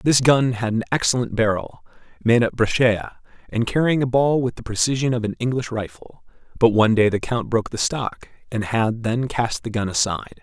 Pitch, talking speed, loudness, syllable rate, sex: 115 Hz, 200 wpm, -21 LUFS, 5.4 syllables/s, male